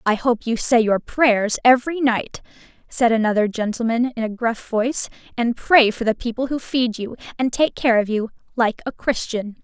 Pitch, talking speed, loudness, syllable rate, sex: 235 Hz, 185 wpm, -20 LUFS, 4.9 syllables/s, female